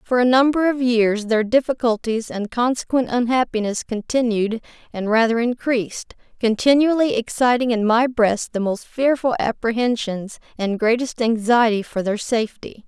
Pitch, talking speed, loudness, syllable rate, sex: 235 Hz, 135 wpm, -19 LUFS, 4.8 syllables/s, female